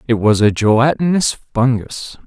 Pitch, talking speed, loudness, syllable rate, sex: 120 Hz, 135 wpm, -15 LUFS, 4.8 syllables/s, male